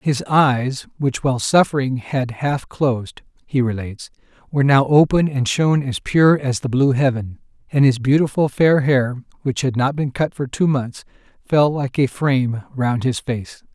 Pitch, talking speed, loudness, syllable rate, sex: 135 Hz, 180 wpm, -18 LUFS, 4.6 syllables/s, male